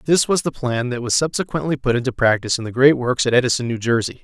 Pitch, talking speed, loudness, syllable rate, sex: 130 Hz, 255 wpm, -19 LUFS, 6.6 syllables/s, male